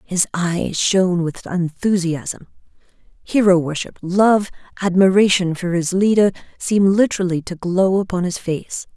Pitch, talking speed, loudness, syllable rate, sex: 185 Hz, 125 wpm, -18 LUFS, 4.5 syllables/s, female